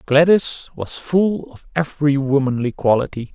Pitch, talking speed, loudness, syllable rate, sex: 145 Hz, 125 wpm, -19 LUFS, 4.5 syllables/s, male